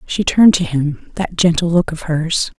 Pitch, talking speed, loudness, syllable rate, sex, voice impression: 170 Hz, 210 wpm, -16 LUFS, 4.7 syllables/s, female, feminine, adult-like, slightly soft, slightly intellectual, calm, slightly sweet